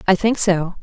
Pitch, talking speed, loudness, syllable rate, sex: 190 Hz, 215 wpm, -17 LUFS, 4.8 syllables/s, female